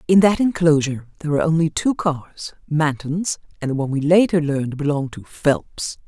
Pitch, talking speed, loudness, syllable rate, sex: 155 Hz, 160 wpm, -20 LUFS, 5.4 syllables/s, female